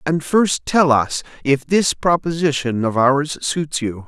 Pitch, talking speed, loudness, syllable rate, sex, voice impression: 145 Hz, 160 wpm, -18 LUFS, 3.7 syllables/s, male, very masculine, very adult-like, thick, sincere, slightly calm, slightly friendly